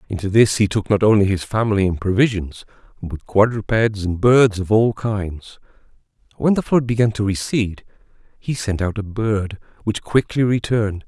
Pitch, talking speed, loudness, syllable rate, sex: 105 Hz, 170 wpm, -19 LUFS, 5.0 syllables/s, male